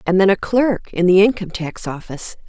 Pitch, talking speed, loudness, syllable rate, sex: 190 Hz, 220 wpm, -17 LUFS, 5.9 syllables/s, female